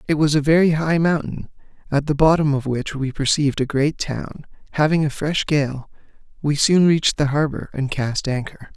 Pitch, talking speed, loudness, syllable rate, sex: 145 Hz, 190 wpm, -19 LUFS, 5.1 syllables/s, male